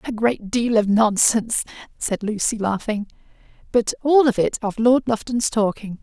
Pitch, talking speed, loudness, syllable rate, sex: 220 Hz, 160 wpm, -20 LUFS, 4.5 syllables/s, female